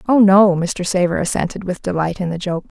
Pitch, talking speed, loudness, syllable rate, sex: 185 Hz, 215 wpm, -17 LUFS, 5.6 syllables/s, female